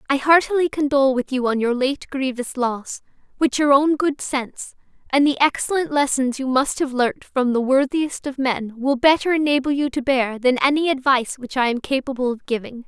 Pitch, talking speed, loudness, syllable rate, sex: 265 Hz, 200 wpm, -20 LUFS, 5.3 syllables/s, female